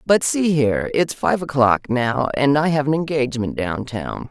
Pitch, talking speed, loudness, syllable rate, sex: 135 Hz, 195 wpm, -19 LUFS, 4.6 syllables/s, female